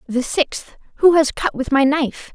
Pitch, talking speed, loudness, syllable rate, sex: 285 Hz, 205 wpm, -18 LUFS, 4.6 syllables/s, female